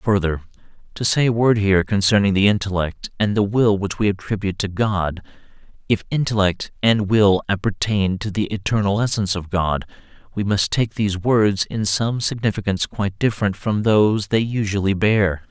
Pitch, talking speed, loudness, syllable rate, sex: 100 Hz, 165 wpm, -19 LUFS, 4.3 syllables/s, male